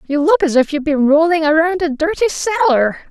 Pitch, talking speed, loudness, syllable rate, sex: 320 Hz, 215 wpm, -14 LUFS, 5.1 syllables/s, female